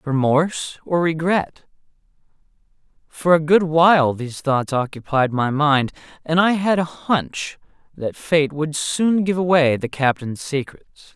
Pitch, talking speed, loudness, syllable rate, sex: 155 Hz, 140 wpm, -19 LUFS, 4.0 syllables/s, male